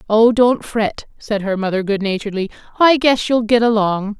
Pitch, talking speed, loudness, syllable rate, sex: 220 Hz, 185 wpm, -16 LUFS, 5.0 syllables/s, female